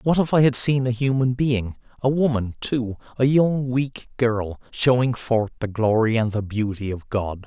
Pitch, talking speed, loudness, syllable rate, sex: 120 Hz, 195 wpm, -22 LUFS, 4.4 syllables/s, male